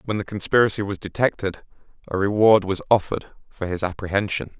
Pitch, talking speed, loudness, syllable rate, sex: 100 Hz, 155 wpm, -22 LUFS, 6.0 syllables/s, male